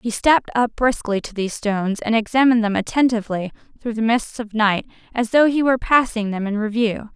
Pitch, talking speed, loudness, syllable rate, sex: 225 Hz, 200 wpm, -19 LUFS, 5.8 syllables/s, female